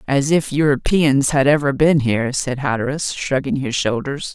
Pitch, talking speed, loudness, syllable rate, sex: 135 Hz, 165 wpm, -18 LUFS, 4.8 syllables/s, female